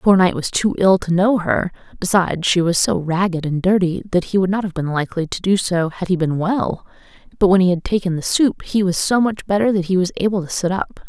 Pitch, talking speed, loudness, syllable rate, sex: 185 Hz, 265 wpm, -18 LUFS, 5.8 syllables/s, female